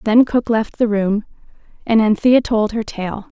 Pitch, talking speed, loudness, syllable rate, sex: 220 Hz, 175 wpm, -17 LUFS, 4.3 syllables/s, female